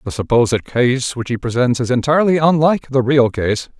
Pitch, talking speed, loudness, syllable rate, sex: 130 Hz, 190 wpm, -16 LUFS, 5.5 syllables/s, male